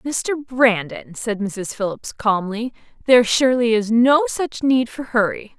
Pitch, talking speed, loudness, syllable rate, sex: 235 Hz, 150 wpm, -19 LUFS, 4.1 syllables/s, female